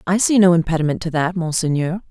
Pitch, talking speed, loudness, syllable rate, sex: 175 Hz, 200 wpm, -17 LUFS, 6.3 syllables/s, female